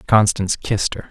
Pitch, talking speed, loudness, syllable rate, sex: 105 Hz, 165 wpm, -19 LUFS, 6.2 syllables/s, male